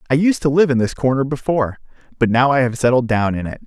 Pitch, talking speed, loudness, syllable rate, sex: 130 Hz, 260 wpm, -17 LUFS, 6.5 syllables/s, male